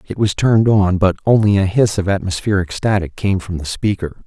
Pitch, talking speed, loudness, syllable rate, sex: 95 Hz, 210 wpm, -16 LUFS, 5.5 syllables/s, male